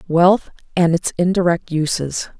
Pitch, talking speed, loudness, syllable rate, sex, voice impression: 170 Hz, 125 wpm, -18 LUFS, 4.3 syllables/s, female, very feminine, very adult-like, thin, tensed, slightly powerful, slightly bright, slightly soft, clear, fluent, cute, very intellectual, refreshing, sincere, very calm, friendly, reassuring, slightly unique, very elegant, very sweet, slightly lively, very kind, modest, light